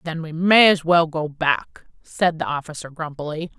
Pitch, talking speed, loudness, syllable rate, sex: 160 Hz, 185 wpm, -20 LUFS, 4.7 syllables/s, female